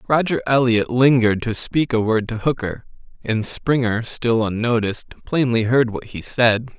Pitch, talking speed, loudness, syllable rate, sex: 120 Hz, 160 wpm, -19 LUFS, 4.7 syllables/s, male